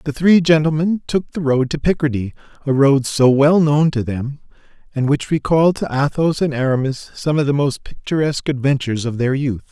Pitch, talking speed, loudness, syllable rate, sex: 145 Hz, 190 wpm, -17 LUFS, 5.4 syllables/s, male